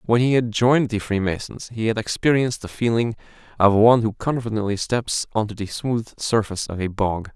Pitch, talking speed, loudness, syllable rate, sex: 110 Hz, 190 wpm, -21 LUFS, 5.5 syllables/s, male